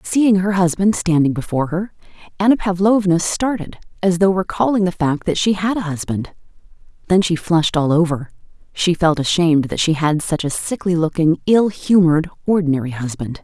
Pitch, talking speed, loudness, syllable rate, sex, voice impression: 175 Hz, 170 wpm, -17 LUFS, 5.4 syllables/s, female, feminine, adult-like, fluent, slightly cool, calm, slightly elegant, slightly sweet